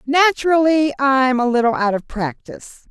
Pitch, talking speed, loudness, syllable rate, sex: 265 Hz, 145 wpm, -17 LUFS, 4.9 syllables/s, female